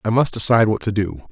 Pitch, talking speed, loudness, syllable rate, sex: 105 Hz, 275 wpm, -18 LUFS, 7.0 syllables/s, male